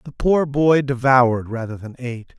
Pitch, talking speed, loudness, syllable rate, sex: 130 Hz, 175 wpm, -18 LUFS, 4.9 syllables/s, male